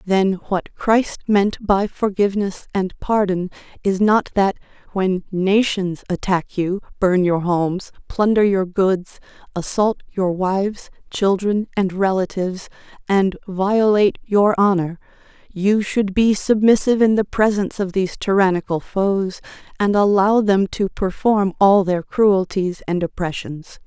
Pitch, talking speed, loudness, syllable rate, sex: 195 Hz, 130 wpm, -19 LUFS, 4.1 syllables/s, female